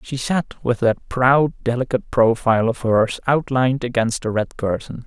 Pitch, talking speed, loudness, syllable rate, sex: 125 Hz, 165 wpm, -19 LUFS, 4.9 syllables/s, male